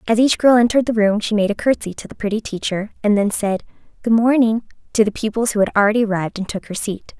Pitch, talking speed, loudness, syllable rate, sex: 215 Hz, 250 wpm, -18 LUFS, 6.5 syllables/s, female